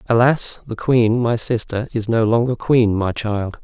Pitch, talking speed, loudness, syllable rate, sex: 115 Hz, 180 wpm, -18 LUFS, 4.2 syllables/s, male